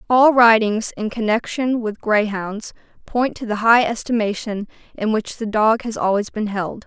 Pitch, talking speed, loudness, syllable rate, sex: 220 Hz, 165 wpm, -19 LUFS, 4.5 syllables/s, female